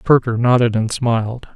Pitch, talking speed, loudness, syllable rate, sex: 120 Hz, 155 wpm, -17 LUFS, 5.0 syllables/s, male